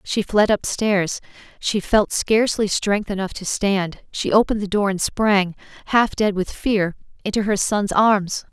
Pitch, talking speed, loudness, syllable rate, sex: 200 Hz, 170 wpm, -20 LUFS, 4.2 syllables/s, female